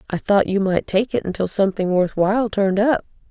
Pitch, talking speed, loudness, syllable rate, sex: 200 Hz, 220 wpm, -19 LUFS, 5.9 syllables/s, female